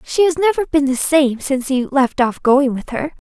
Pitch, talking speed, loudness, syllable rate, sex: 280 Hz, 235 wpm, -16 LUFS, 5.0 syllables/s, female